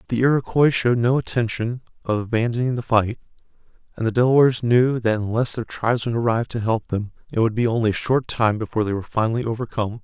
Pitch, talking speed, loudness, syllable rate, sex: 115 Hz, 195 wpm, -21 LUFS, 6.7 syllables/s, male